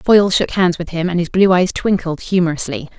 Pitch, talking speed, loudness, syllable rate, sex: 180 Hz, 220 wpm, -16 LUFS, 5.9 syllables/s, female